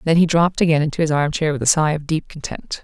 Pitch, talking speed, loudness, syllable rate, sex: 155 Hz, 275 wpm, -18 LUFS, 6.6 syllables/s, female